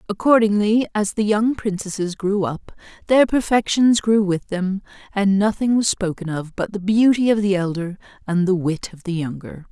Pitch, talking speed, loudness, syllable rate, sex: 200 Hz, 180 wpm, -19 LUFS, 4.8 syllables/s, female